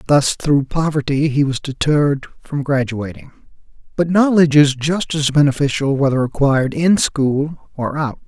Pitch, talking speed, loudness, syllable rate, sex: 145 Hz, 145 wpm, -17 LUFS, 4.7 syllables/s, male